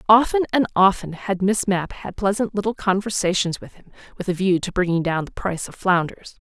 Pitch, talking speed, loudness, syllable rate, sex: 195 Hz, 205 wpm, -21 LUFS, 5.6 syllables/s, female